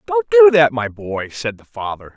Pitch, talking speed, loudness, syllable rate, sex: 160 Hz, 220 wpm, -16 LUFS, 4.5 syllables/s, male